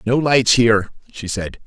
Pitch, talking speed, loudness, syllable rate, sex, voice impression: 115 Hz, 180 wpm, -16 LUFS, 4.7 syllables/s, male, very masculine, very adult-like, slightly thick, cool, slightly sincere, slightly wild